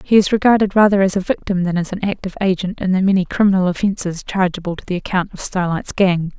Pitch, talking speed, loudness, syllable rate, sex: 190 Hz, 225 wpm, -17 LUFS, 6.4 syllables/s, female